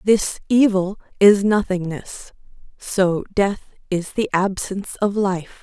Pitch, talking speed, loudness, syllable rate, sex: 195 Hz, 115 wpm, -20 LUFS, 3.6 syllables/s, female